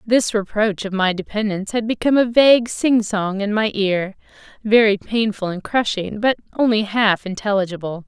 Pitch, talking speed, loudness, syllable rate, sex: 210 Hz, 165 wpm, -18 LUFS, 5.1 syllables/s, female